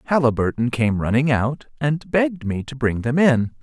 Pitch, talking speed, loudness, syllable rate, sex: 130 Hz, 180 wpm, -20 LUFS, 4.9 syllables/s, male